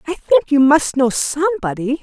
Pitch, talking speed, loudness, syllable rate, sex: 285 Hz, 175 wpm, -16 LUFS, 4.9 syllables/s, female